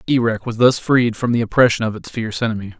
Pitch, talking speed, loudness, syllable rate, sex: 115 Hz, 235 wpm, -18 LUFS, 6.6 syllables/s, male